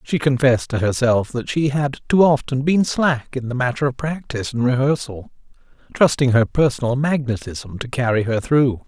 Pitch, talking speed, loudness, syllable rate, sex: 130 Hz, 175 wpm, -19 LUFS, 5.1 syllables/s, male